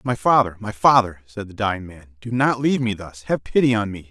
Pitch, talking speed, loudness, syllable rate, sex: 110 Hz, 250 wpm, -20 LUFS, 5.9 syllables/s, male